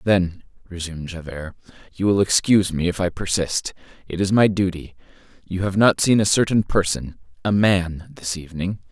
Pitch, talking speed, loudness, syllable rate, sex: 90 Hz, 155 wpm, -21 LUFS, 5.1 syllables/s, male